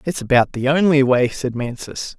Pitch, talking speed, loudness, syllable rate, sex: 135 Hz, 190 wpm, -18 LUFS, 4.8 syllables/s, male